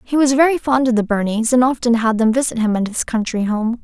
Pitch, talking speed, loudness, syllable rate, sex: 240 Hz, 265 wpm, -17 LUFS, 5.9 syllables/s, female